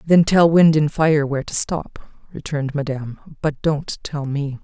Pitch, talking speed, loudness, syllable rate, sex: 150 Hz, 180 wpm, -19 LUFS, 4.5 syllables/s, female